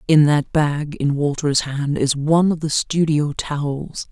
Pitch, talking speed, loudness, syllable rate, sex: 150 Hz, 175 wpm, -19 LUFS, 4.1 syllables/s, female